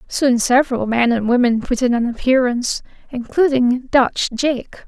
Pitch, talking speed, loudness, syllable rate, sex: 250 Hz, 150 wpm, -17 LUFS, 4.6 syllables/s, female